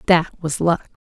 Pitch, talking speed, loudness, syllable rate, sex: 165 Hz, 175 wpm, -20 LUFS, 4.0 syllables/s, female